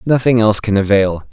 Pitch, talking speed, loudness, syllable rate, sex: 110 Hz, 180 wpm, -13 LUFS, 5.8 syllables/s, male